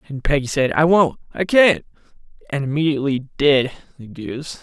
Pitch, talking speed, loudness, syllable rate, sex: 145 Hz, 145 wpm, -18 LUFS, 5.5 syllables/s, male